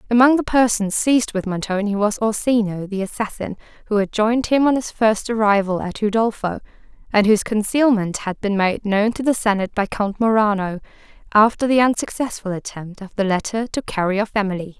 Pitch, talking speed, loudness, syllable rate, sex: 210 Hz, 180 wpm, -19 LUFS, 5.6 syllables/s, female